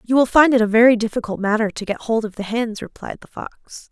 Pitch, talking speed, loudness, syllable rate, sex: 225 Hz, 260 wpm, -18 LUFS, 5.9 syllables/s, female